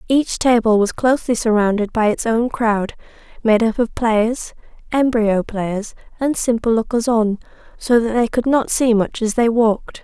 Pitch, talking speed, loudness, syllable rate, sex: 230 Hz, 175 wpm, -17 LUFS, 4.5 syllables/s, female